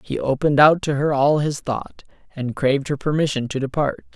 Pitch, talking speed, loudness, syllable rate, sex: 140 Hz, 200 wpm, -20 LUFS, 5.5 syllables/s, male